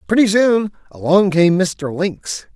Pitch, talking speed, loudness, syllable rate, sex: 185 Hz, 140 wpm, -16 LUFS, 3.7 syllables/s, male